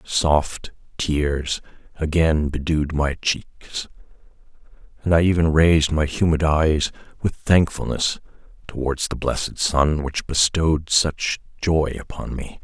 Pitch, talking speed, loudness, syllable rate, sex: 75 Hz, 120 wpm, -21 LUFS, 3.9 syllables/s, male